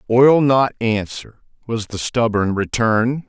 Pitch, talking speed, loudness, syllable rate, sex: 115 Hz, 130 wpm, -17 LUFS, 3.6 syllables/s, male